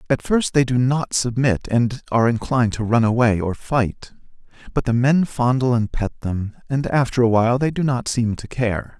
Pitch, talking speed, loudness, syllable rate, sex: 120 Hz, 200 wpm, -20 LUFS, 5.0 syllables/s, male